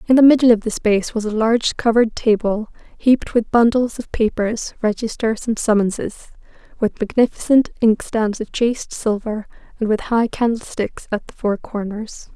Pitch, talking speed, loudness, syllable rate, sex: 225 Hz, 160 wpm, -18 LUFS, 5.1 syllables/s, female